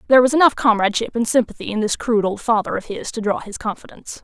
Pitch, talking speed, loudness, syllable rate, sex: 230 Hz, 240 wpm, -19 LUFS, 7.2 syllables/s, female